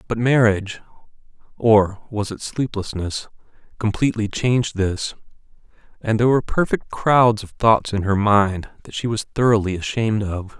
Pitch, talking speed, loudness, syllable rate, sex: 110 Hz, 130 wpm, -20 LUFS, 5.0 syllables/s, male